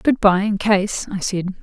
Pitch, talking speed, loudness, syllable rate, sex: 200 Hz, 220 wpm, -19 LUFS, 4.1 syllables/s, female